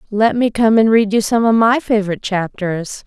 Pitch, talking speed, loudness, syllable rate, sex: 215 Hz, 215 wpm, -15 LUFS, 5.3 syllables/s, female